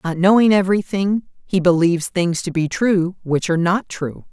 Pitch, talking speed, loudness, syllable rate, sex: 180 Hz, 180 wpm, -18 LUFS, 5.1 syllables/s, female